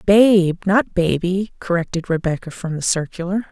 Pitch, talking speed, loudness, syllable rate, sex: 180 Hz, 135 wpm, -19 LUFS, 4.6 syllables/s, female